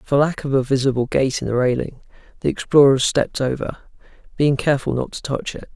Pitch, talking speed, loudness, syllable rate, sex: 135 Hz, 200 wpm, -19 LUFS, 6.1 syllables/s, male